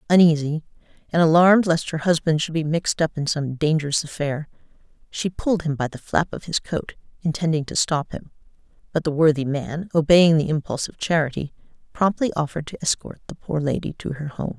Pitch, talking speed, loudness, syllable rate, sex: 160 Hz, 190 wpm, -22 LUFS, 5.8 syllables/s, female